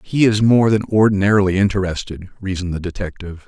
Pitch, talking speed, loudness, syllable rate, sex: 100 Hz, 155 wpm, -17 LUFS, 6.5 syllables/s, male